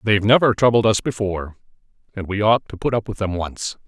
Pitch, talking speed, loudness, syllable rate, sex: 105 Hz, 230 wpm, -19 LUFS, 6.1 syllables/s, male